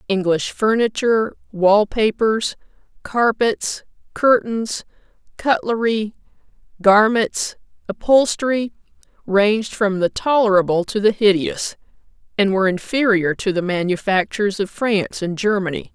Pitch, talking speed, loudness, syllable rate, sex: 210 Hz, 100 wpm, -18 LUFS, 4.4 syllables/s, female